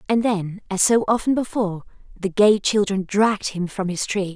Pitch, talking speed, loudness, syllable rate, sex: 200 Hz, 195 wpm, -21 LUFS, 5.0 syllables/s, female